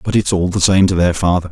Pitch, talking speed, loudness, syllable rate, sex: 90 Hz, 315 wpm, -14 LUFS, 6.4 syllables/s, male